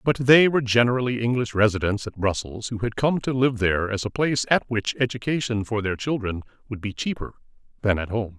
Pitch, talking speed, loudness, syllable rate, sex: 115 Hz, 205 wpm, -23 LUFS, 5.9 syllables/s, male